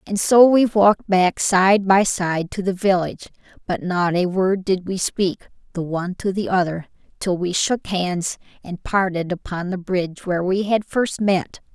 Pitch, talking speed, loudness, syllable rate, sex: 185 Hz, 190 wpm, -20 LUFS, 4.4 syllables/s, female